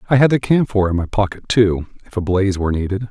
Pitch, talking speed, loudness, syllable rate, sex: 100 Hz, 250 wpm, -17 LUFS, 6.7 syllables/s, male